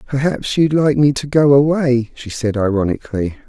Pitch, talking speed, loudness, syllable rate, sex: 130 Hz, 170 wpm, -16 LUFS, 5.1 syllables/s, male